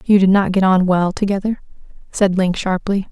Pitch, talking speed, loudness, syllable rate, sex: 190 Hz, 190 wpm, -16 LUFS, 5.2 syllables/s, female